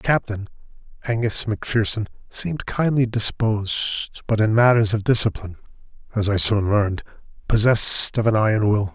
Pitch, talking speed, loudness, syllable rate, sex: 110 Hz, 140 wpm, -20 LUFS, 5.3 syllables/s, male